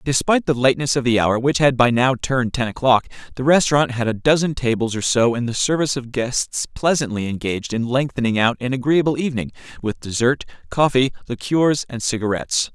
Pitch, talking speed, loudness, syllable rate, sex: 125 Hz, 190 wpm, -19 LUFS, 5.9 syllables/s, male